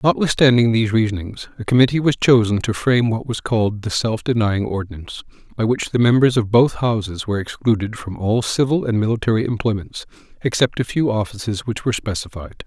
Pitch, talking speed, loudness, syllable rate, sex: 110 Hz, 180 wpm, -18 LUFS, 5.9 syllables/s, male